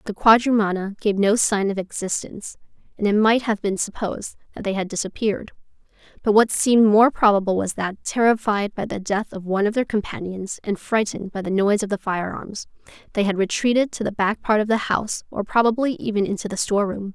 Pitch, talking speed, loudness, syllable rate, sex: 210 Hz, 205 wpm, -21 LUFS, 5.9 syllables/s, female